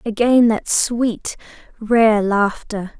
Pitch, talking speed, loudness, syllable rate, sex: 225 Hz, 100 wpm, -17 LUFS, 2.9 syllables/s, female